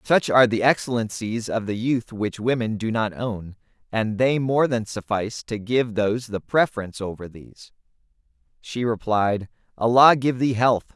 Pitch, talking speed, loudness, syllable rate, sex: 115 Hz, 165 wpm, -22 LUFS, 4.8 syllables/s, male